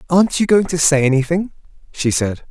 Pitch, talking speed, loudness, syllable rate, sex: 160 Hz, 190 wpm, -16 LUFS, 5.8 syllables/s, male